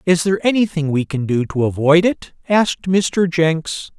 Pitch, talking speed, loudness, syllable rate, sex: 165 Hz, 180 wpm, -17 LUFS, 4.6 syllables/s, male